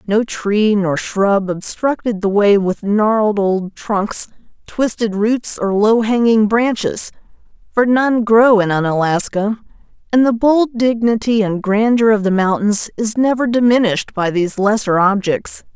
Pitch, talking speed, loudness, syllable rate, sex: 215 Hz, 145 wpm, -15 LUFS, 4.2 syllables/s, female